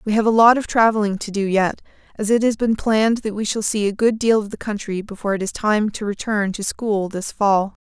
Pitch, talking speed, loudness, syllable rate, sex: 210 Hz, 260 wpm, -19 LUFS, 5.6 syllables/s, female